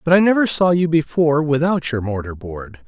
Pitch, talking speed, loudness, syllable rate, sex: 150 Hz, 210 wpm, -17 LUFS, 5.4 syllables/s, male